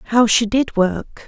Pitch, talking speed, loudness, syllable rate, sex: 225 Hz, 190 wpm, -16 LUFS, 3.3 syllables/s, female